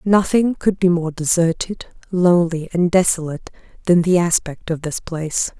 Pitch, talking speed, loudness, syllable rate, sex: 175 Hz, 150 wpm, -18 LUFS, 4.9 syllables/s, female